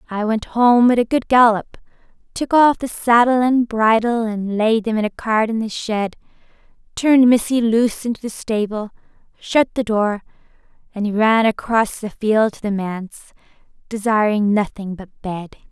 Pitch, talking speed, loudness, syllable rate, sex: 220 Hz, 165 wpm, -17 LUFS, 4.6 syllables/s, female